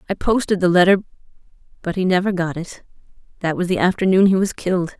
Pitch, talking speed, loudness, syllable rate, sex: 180 Hz, 190 wpm, -18 LUFS, 6.6 syllables/s, female